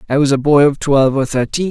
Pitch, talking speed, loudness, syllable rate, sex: 140 Hz, 280 wpm, -14 LUFS, 6.3 syllables/s, male